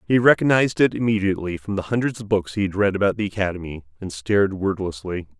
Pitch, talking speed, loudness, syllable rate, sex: 100 Hz, 200 wpm, -21 LUFS, 6.6 syllables/s, male